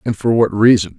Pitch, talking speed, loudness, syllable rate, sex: 110 Hz, 245 wpm, -14 LUFS, 5.6 syllables/s, male